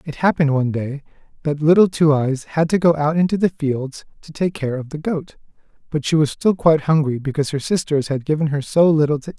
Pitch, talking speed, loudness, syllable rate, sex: 150 Hz, 235 wpm, -19 LUFS, 6.0 syllables/s, male